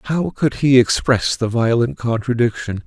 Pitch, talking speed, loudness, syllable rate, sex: 120 Hz, 145 wpm, -17 LUFS, 4.2 syllables/s, male